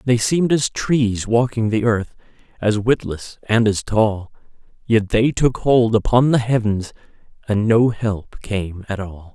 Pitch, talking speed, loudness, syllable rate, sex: 110 Hz, 160 wpm, -18 LUFS, 3.9 syllables/s, male